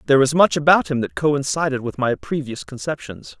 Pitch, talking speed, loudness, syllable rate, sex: 135 Hz, 195 wpm, -19 LUFS, 5.6 syllables/s, male